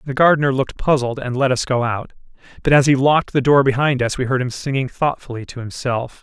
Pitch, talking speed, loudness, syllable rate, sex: 130 Hz, 230 wpm, -18 LUFS, 6.1 syllables/s, male